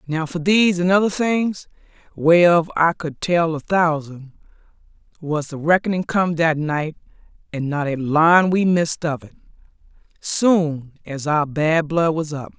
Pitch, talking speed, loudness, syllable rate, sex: 165 Hz, 155 wpm, -19 LUFS, 3.7 syllables/s, female